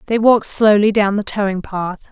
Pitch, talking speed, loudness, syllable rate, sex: 205 Hz, 200 wpm, -15 LUFS, 5.2 syllables/s, female